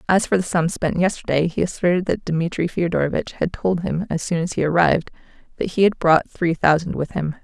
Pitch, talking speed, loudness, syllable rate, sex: 170 Hz, 220 wpm, -20 LUFS, 5.7 syllables/s, female